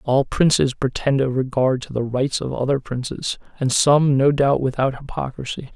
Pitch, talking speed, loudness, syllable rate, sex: 135 Hz, 175 wpm, -20 LUFS, 4.8 syllables/s, male